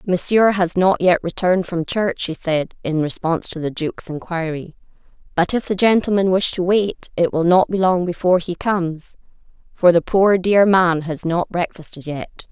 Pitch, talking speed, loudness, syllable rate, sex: 180 Hz, 185 wpm, -18 LUFS, 4.9 syllables/s, female